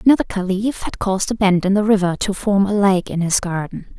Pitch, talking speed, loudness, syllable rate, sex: 195 Hz, 255 wpm, -18 LUFS, 5.4 syllables/s, female